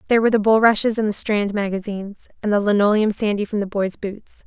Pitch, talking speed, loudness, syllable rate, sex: 210 Hz, 215 wpm, -19 LUFS, 6.3 syllables/s, female